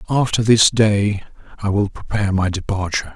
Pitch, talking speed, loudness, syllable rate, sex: 105 Hz, 150 wpm, -18 LUFS, 5.5 syllables/s, male